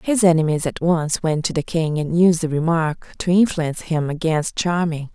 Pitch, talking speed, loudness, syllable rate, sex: 165 Hz, 200 wpm, -20 LUFS, 4.9 syllables/s, female